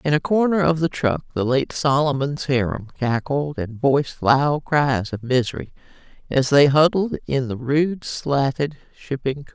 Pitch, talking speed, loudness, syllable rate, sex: 140 Hz, 165 wpm, -20 LUFS, 4.4 syllables/s, female